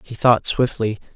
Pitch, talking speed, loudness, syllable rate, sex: 115 Hz, 155 wpm, -19 LUFS, 4.4 syllables/s, male